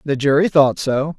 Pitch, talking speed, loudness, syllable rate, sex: 145 Hz, 205 wpm, -16 LUFS, 4.6 syllables/s, male